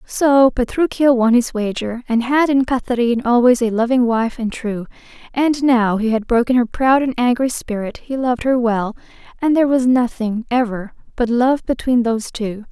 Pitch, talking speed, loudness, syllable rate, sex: 240 Hz, 185 wpm, -17 LUFS, 4.9 syllables/s, female